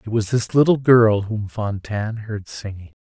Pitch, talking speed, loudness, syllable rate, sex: 110 Hz, 180 wpm, -19 LUFS, 4.6 syllables/s, male